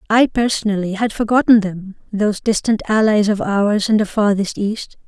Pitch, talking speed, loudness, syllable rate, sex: 210 Hz, 165 wpm, -17 LUFS, 5.0 syllables/s, female